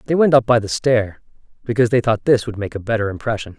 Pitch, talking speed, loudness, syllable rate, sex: 115 Hz, 250 wpm, -18 LUFS, 6.7 syllables/s, male